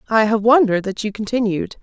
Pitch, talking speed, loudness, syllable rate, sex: 215 Hz, 195 wpm, -17 LUFS, 6.2 syllables/s, female